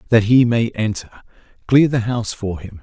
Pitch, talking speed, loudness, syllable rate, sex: 110 Hz, 190 wpm, -17 LUFS, 5.4 syllables/s, male